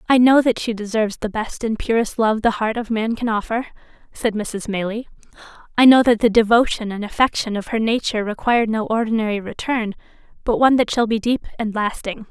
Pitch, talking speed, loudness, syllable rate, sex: 225 Hz, 200 wpm, -19 LUFS, 5.8 syllables/s, female